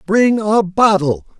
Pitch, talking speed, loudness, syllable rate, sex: 195 Hz, 130 wpm, -14 LUFS, 3.5 syllables/s, male